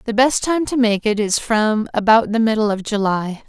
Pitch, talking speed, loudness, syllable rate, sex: 220 Hz, 225 wpm, -17 LUFS, 4.9 syllables/s, female